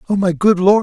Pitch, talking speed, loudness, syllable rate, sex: 195 Hz, 290 wpm, -14 LUFS, 5.9 syllables/s, male